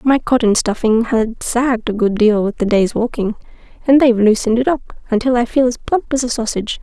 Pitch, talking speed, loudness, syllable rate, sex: 235 Hz, 220 wpm, -16 LUFS, 5.8 syllables/s, female